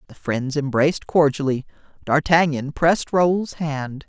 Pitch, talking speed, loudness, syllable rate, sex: 150 Hz, 120 wpm, -20 LUFS, 4.3 syllables/s, male